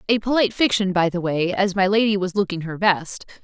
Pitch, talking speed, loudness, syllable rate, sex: 195 Hz, 225 wpm, -20 LUFS, 5.8 syllables/s, female